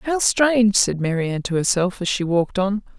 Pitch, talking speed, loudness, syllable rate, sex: 200 Hz, 200 wpm, -19 LUFS, 5.3 syllables/s, female